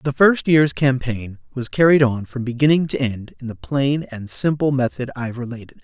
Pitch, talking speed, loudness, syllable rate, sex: 130 Hz, 195 wpm, -19 LUFS, 5.1 syllables/s, male